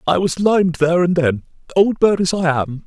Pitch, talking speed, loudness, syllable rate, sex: 170 Hz, 230 wpm, -16 LUFS, 5.4 syllables/s, male